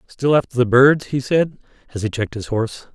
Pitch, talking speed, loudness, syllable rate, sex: 125 Hz, 225 wpm, -18 LUFS, 5.8 syllables/s, male